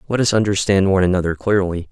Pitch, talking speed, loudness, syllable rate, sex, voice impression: 95 Hz, 190 wpm, -17 LUFS, 6.9 syllables/s, male, very masculine, adult-like, slightly middle-aged, very thick, relaxed, slightly weak, dark, slightly soft, muffled, slightly fluent, slightly cool, intellectual, very sincere, very calm, mature, slightly friendly, slightly reassuring, very unique, slightly elegant, wild, sweet, very kind, very modest